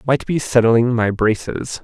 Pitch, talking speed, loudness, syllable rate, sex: 120 Hz, 165 wpm, -17 LUFS, 4.1 syllables/s, male